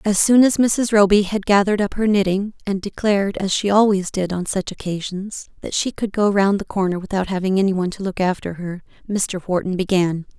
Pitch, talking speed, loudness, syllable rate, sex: 195 Hz, 215 wpm, -19 LUFS, 5.6 syllables/s, female